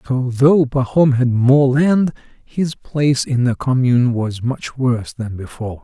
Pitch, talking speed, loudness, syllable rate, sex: 130 Hz, 165 wpm, -17 LUFS, 4.4 syllables/s, male